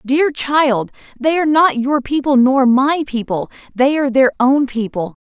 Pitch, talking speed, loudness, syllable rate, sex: 265 Hz, 170 wpm, -15 LUFS, 4.4 syllables/s, female